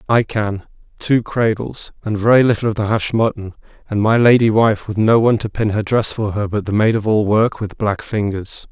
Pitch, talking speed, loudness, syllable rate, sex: 110 Hz, 220 wpm, -17 LUFS, 5.2 syllables/s, male